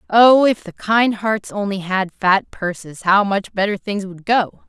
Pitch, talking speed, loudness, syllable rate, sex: 200 Hz, 190 wpm, -18 LUFS, 4.1 syllables/s, female